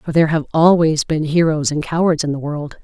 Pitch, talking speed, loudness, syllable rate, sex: 155 Hz, 235 wpm, -16 LUFS, 5.7 syllables/s, female